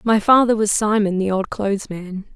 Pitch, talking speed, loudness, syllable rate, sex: 205 Hz, 205 wpm, -18 LUFS, 5.1 syllables/s, female